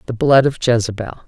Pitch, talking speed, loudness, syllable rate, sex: 135 Hz, 190 wpm, -15 LUFS, 7.0 syllables/s, female